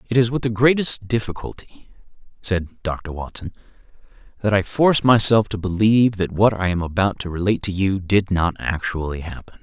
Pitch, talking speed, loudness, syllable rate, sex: 100 Hz, 175 wpm, -20 LUFS, 5.3 syllables/s, male